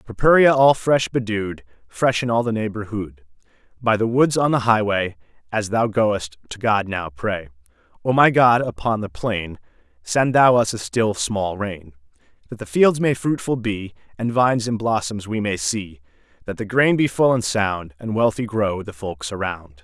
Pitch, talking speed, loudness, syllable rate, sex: 110 Hz, 180 wpm, -20 LUFS, 4.6 syllables/s, male